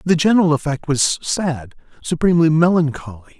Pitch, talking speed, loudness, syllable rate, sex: 155 Hz, 125 wpm, -17 LUFS, 5.4 syllables/s, male